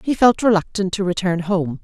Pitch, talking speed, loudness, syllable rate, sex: 190 Hz, 195 wpm, -18 LUFS, 5.2 syllables/s, female